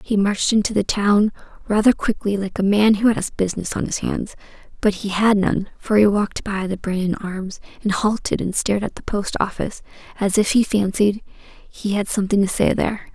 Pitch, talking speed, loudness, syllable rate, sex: 205 Hz, 200 wpm, -20 LUFS, 5.3 syllables/s, female